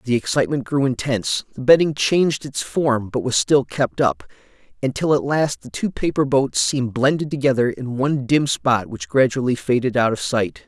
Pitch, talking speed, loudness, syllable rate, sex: 130 Hz, 190 wpm, -20 LUFS, 5.2 syllables/s, male